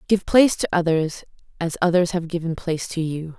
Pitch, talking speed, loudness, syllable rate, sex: 170 Hz, 195 wpm, -21 LUFS, 5.8 syllables/s, female